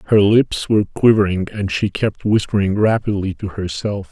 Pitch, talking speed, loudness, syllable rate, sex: 100 Hz, 160 wpm, -17 LUFS, 5.0 syllables/s, male